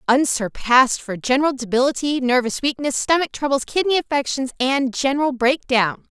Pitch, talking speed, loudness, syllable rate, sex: 265 Hz, 135 wpm, -19 LUFS, 5.3 syllables/s, female